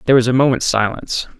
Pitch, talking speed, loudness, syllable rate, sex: 125 Hz, 215 wpm, -16 LUFS, 7.6 syllables/s, male